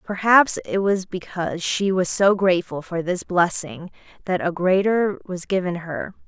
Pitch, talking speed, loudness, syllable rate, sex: 185 Hz, 160 wpm, -21 LUFS, 4.5 syllables/s, female